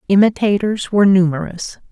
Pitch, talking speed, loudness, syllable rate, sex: 195 Hz, 95 wpm, -15 LUFS, 5.4 syllables/s, female